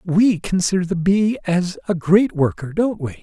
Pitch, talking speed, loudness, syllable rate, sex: 180 Hz, 185 wpm, -19 LUFS, 4.4 syllables/s, male